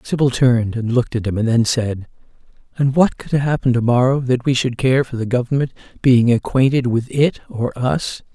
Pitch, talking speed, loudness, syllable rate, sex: 125 Hz, 200 wpm, -17 LUFS, 5.2 syllables/s, male